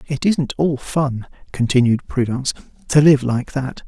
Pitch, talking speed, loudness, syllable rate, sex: 135 Hz, 155 wpm, -18 LUFS, 4.5 syllables/s, male